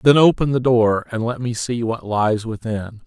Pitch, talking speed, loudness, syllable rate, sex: 115 Hz, 215 wpm, -19 LUFS, 4.5 syllables/s, male